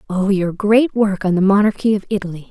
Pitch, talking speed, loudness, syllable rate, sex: 200 Hz, 215 wpm, -16 LUFS, 5.7 syllables/s, female